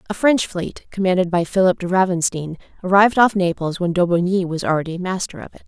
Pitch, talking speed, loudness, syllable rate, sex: 180 Hz, 190 wpm, -19 LUFS, 6.0 syllables/s, female